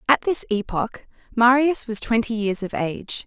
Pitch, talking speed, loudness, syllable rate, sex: 225 Hz, 165 wpm, -21 LUFS, 4.6 syllables/s, female